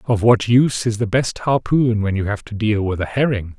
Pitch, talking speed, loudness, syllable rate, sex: 110 Hz, 250 wpm, -18 LUFS, 5.3 syllables/s, male